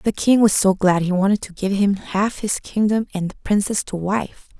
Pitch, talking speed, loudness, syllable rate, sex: 200 Hz, 235 wpm, -19 LUFS, 4.8 syllables/s, female